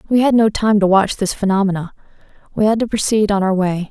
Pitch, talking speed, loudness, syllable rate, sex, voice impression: 205 Hz, 230 wpm, -16 LUFS, 6.4 syllables/s, female, feminine, adult-like, tensed, powerful, slightly soft, slightly raspy, intellectual, calm, elegant, lively, slightly sharp, slightly modest